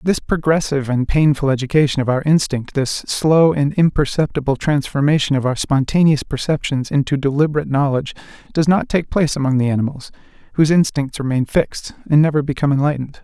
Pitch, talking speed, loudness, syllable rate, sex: 145 Hz, 160 wpm, -17 LUFS, 6.2 syllables/s, male